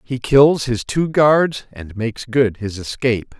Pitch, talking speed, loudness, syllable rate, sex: 125 Hz, 175 wpm, -17 LUFS, 4.0 syllables/s, male